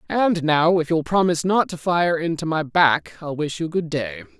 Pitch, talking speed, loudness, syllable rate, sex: 160 Hz, 220 wpm, -20 LUFS, 4.8 syllables/s, male